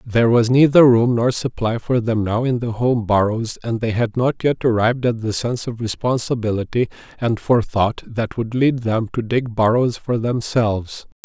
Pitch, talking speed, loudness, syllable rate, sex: 115 Hz, 185 wpm, -19 LUFS, 4.9 syllables/s, male